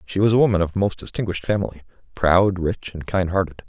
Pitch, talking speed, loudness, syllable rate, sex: 95 Hz, 210 wpm, -21 LUFS, 6.2 syllables/s, male